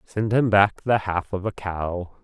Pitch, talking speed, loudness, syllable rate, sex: 100 Hz, 215 wpm, -23 LUFS, 3.9 syllables/s, male